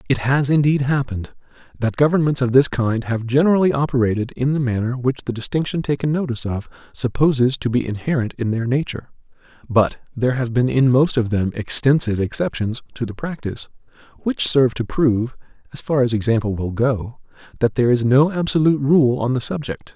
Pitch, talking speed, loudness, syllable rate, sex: 130 Hz, 180 wpm, -19 LUFS, 5.9 syllables/s, male